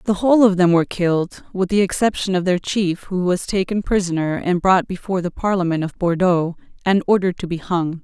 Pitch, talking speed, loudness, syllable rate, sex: 185 Hz, 210 wpm, -19 LUFS, 5.8 syllables/s, female